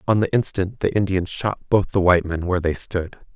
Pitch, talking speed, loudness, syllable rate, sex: 95 Hz, 235 wpm, -21 LUFS, 5.7 syllables/s, male